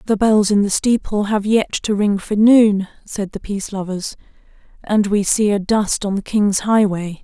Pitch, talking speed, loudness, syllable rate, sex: 205 Hz, 200 wpm, -17 LUFS, 4.5 syllables/s, female